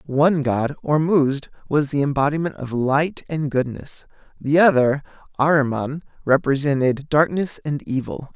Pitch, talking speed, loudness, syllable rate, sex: 145 Hz, 120 wpm, -20 LUFS, 4.4 syllables/s, male